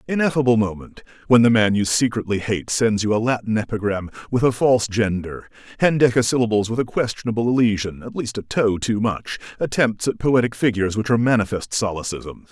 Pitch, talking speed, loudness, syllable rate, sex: 110 Hz, 165 wpm, -20 LUFS, 5.8 syllables/s, male